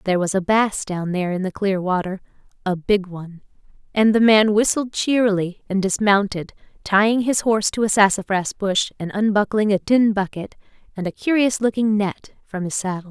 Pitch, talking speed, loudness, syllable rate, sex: 200 Hz, 175 wpm, -20 LUFS, 5.3 syllables/s, female